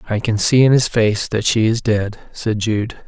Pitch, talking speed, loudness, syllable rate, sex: 110 Hz, 235 wpm, -17 LUFS, 4.2 syllables/s, male